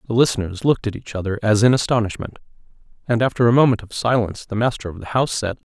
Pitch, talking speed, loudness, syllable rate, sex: 110 Hz, 220 wpm, -19 LUFS, 7.1 syllables/s, male